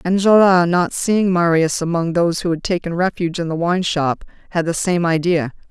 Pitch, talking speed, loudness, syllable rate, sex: 170 Hz, 190 wpm, -17 LUFS, 5.2 syllables/s, female